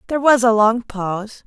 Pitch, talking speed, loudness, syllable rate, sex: 230 Hz, 205 wpm, -16 LUFS, 5.5 syllables/s, female